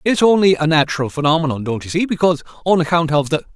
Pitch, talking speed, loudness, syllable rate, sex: 160 Hz, 220 wpm, -16 LUFS, 7.0 syllables/s, male